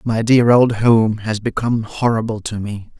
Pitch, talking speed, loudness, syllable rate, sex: 110 Hz, 180 wpm, -16 LUFS, 4.6 syllables/s, male